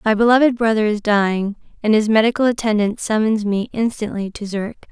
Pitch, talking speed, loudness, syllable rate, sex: 215 Hz, 170 wpm, -18 LUFS, 5.8 syllables/s, female